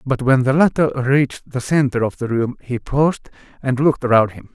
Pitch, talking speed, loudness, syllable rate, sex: 130 Hz, 210 wpm, -18 LUFS, 5.5 syllables/s, male